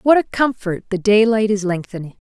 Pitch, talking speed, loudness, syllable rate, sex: 210 Hz, 210 wpm, -17 LUFS, 5.3 syllables/s, female